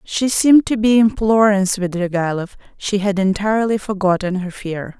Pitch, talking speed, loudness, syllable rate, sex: 200 Hz, 145 wpm, -17 LUFS, 4.9 syllables/s, female